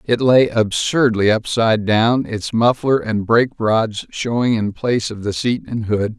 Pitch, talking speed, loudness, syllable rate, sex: 115 Hz, 165 wpm, -17 LUFS, 4.3 syllables/s, male